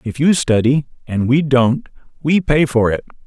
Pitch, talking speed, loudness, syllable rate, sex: 135 Hz, 185 wpm, -16 LUFS, 4.5 syllables/s, male